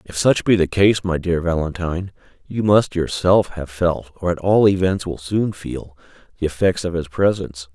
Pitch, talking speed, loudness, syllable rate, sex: 90 Hz, 195 wpm, -19 LUFS, 4.8 syllables/s, male